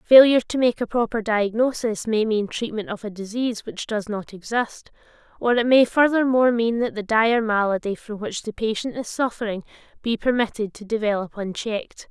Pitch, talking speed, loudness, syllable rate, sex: 220 Hz, 180 wpm, -22 LUFS, 5.3 syllables/s, female